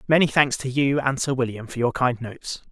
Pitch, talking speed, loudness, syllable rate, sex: 130 Hz, 245 wpm, -22 LUFS, 5.7 syllables/s, male